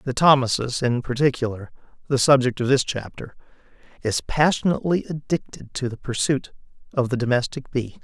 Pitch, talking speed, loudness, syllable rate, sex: 130 Hz, 140 wpm, -22 LUFS, 5.4 syllables/s, male